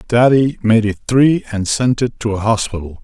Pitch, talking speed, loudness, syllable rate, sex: 115 Hz, 200 wpm, -15 LUFS, 5.0 syllables/s, male